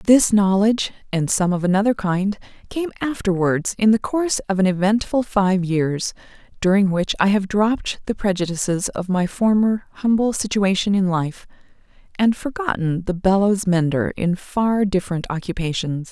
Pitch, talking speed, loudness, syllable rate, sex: 195 Hz, 150 wpm, -20 LUFS, 4.8 syllables/s, female